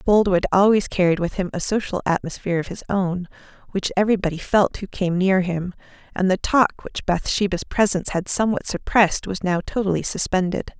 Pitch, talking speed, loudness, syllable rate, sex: 190 Hz, 170 wpm, -21 LUFS, 5.7 syllables/s, female